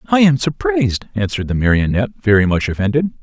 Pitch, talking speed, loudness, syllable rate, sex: 125 Hz, 165 wpm, -16 LUFS, 6.4 syllables/s, male